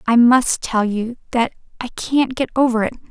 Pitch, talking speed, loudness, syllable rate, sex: 240 Hz, 195 wpm, -18 LUFS, 4.7 syllables/s, female